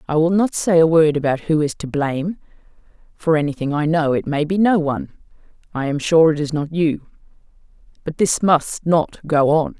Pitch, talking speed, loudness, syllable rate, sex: 155 Hz, 190 wpm, -18 LUFS, 5.2 syllables/s, female